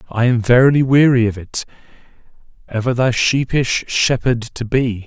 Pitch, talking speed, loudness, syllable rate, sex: 120 Hz, 140 wpm, -16 LUFS, 4.7 syllables/s, male